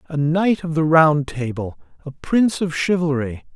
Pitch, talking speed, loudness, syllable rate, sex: 155 Hz, 170 wpm, -19 LUFS, 4.6 syllables/s, male